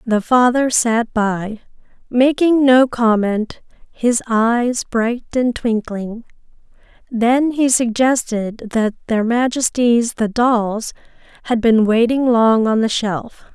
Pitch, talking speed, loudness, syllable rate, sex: 235 Hz, 120 wpm, -16 LUFS, 3.3 syllables/s, female